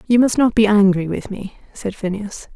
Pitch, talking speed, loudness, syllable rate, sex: 210 Hz, 210 wpm, -17 LUFS, 5.0 syllables/s, female